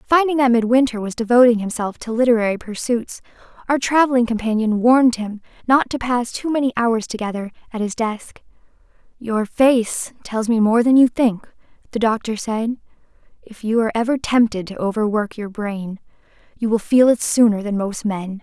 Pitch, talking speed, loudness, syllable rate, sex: 230 Hz, 170 wpm, -18 LUFS, 5.2 syllables/s, female